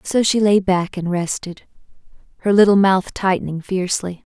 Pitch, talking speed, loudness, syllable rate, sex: 190 Hz, 140 wpm, -18 LUFS, 5.0 syllables/s, female